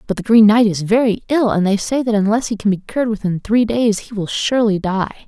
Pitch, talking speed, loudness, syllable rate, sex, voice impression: 215 Hz, 260 wpm, -16 LUFS, 5.9 syllables/s, female, feminine, adult-like, tensed, soft, slightly fluent, slightly raspy, intellectual, calm, friendly, reassuring, elegant, slightly lively, kind